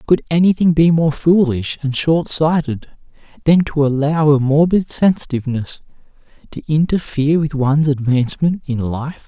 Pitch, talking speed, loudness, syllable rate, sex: 150 Hz, 135 wpm, -16 LUFS, 4.9 syllables/s, male